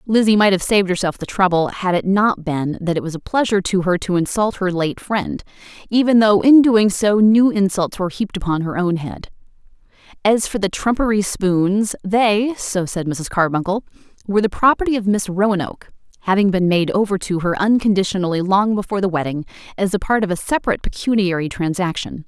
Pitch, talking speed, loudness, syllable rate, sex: 195 Hz, 185 wpm, -18 LUFS, 5.7 syllables/s, female